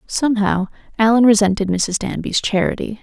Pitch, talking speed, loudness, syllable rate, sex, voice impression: 210 Hz, 120 wpm, -17 LUFS, 5.4 syllables/s, female, very feminine, very adult-like, very thin, slightly tensed, weak, dark, slightly soft, muffled, fluent, very raspy, cute, very intellectual, slightly refreshing, sincere, very calm, very friendly, reassuring, very unique, elegant, wild, very sweet, lively, very kind, very modest, slightly light